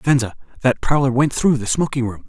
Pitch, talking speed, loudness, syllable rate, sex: 130 Hz, 210 wpm, -19 LUFS, 5.7 syllables/s, male